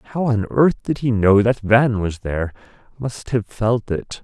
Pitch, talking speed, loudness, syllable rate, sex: 115 Hz, 200 wpm, -19 LUFS, 4.4 syllables/s, male